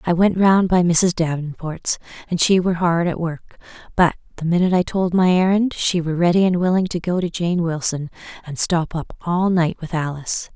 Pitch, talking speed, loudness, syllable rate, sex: 175 Hz, 205 wpm, -19 LUFS, 5.3 syllables/s, female